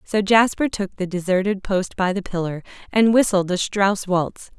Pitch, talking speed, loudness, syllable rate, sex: 195 Hz, 185 wpm, -20 LUFS, 4.6 syllables/s, female